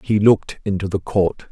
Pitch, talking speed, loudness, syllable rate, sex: 100 Hz, 200 wpm, -19 LUFS, 5.1 syllables/s, male